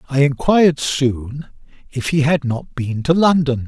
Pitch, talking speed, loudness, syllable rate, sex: 145 Hz, 165 wpm, -17 LUFS, 4.2 syllables/s, male